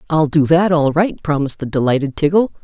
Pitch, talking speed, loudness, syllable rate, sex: 155 Hz, 205 wpm, -16 LUFS, 6.0 syllables/s, female